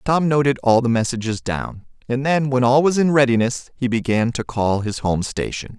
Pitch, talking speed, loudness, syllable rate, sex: 125 Hz, 210 wpm, -19 LUFS, 5.0 syllables/s, male